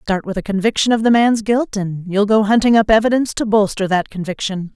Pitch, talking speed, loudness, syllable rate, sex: 210 Hz, 225 wpm, -16 LUFS, 5.7 syllables/s, female